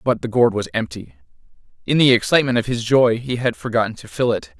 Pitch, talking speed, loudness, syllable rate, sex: 120 Hz, 220 wpm, -18 LUFS, 6.2 syllables/s, male